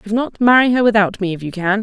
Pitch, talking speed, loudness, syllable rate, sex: 210 Hz, 295 wpm, -15 LUFS, 6.2 syllables/s, female